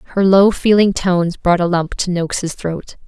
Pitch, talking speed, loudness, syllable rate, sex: 180 Hz, 195 wpm, -15 LUFS, 4.8 syllables/s, female